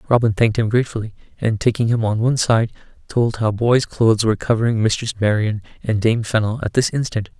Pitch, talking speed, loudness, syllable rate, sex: 115 Hz, 195 wpm, -19 LUFS, 6.1 syllables/s, male